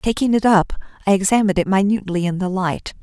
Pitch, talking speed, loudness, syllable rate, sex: 195 Hz, 200 wpm, -18 LUFS, 6.5 syllables/s, female